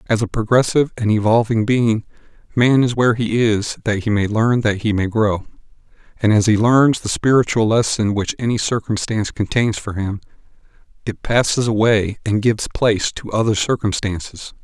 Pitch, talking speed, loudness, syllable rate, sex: 110 Hz, 170 wpm, -17 LUFS, 5.2 syllables/s, male